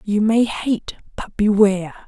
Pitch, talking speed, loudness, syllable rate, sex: 210 Hz, 145 wpm, -18 LUFS, 4.2 syllables/s, female